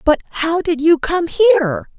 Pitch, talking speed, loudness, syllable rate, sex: 330 Hz, 180 wpm, -15 LUFS, 6.0 syllables/s, female